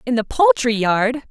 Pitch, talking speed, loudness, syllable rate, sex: 245 Hz, 185 wpm, -17 LUFS, 4.5 syllables/s, female